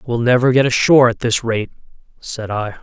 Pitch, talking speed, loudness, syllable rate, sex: 120 Hz, 190 wpm, -15 LUFS, 5.5 syllables/s, male